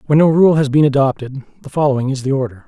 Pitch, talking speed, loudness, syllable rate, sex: 140 Hz, 245 wpm, -15 LUFS, 6.9 syllables/s, male